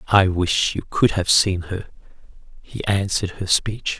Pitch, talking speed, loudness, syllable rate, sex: 95 Hz, 165 wpm, -20 LUFS, 4.3 syllables/s, male